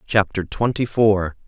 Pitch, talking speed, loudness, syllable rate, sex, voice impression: 100 Hz, 120 wpm, -20 LUFS, 4.1 syllables/s, male, very masculine, old, very thick, slightly tensed, slightly weak, bright, slightly dark, hard, very clear, very fluent, cool, slightly intellectual, refreshing, slightly sincere, calm, very mature, slightly friendly, slightly reassuring, unique, slightly elegant, wild, slightly sweet, lively, kind, slightly intense, slightly sharp, slightly light